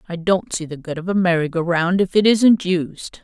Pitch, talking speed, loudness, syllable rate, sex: 175 Hz, 260 wpm, -18 LUFS, 4.9 syllables/s, female